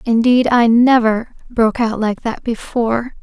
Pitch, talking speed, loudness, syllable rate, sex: 230 Hz, 110 wpm, -15 LUFS, 4.4 syllables/s, female